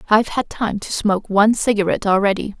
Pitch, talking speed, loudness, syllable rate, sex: 210 Hz, 185 wpm, -18 LUFS, 6.7 syllables/s, female